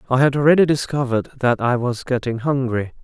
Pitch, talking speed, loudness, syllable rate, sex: 130 Hz, 180 wpm, -19 LUFS, 6.0 syllables/s, male